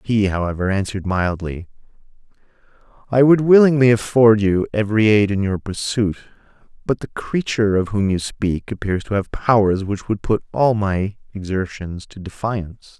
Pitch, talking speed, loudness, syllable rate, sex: 105 Hz, 150 wpm, -18 LUFS, 5.0 syllables/s, male